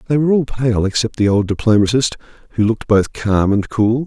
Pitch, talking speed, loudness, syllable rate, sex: 115 Hz, 205 wpm, -16 LUFS, 5.8 syllables/s, male